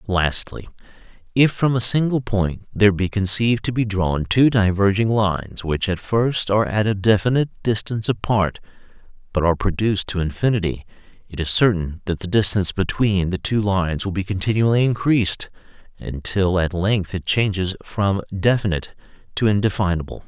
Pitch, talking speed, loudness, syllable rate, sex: 100 Hz, 155 wpm, -20 LUFS, 5.4 syllables/s, male